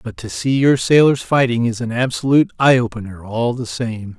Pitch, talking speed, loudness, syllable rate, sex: 120 Hz, 200 wpm, -17 LUFS, 5.2 syllables/s, male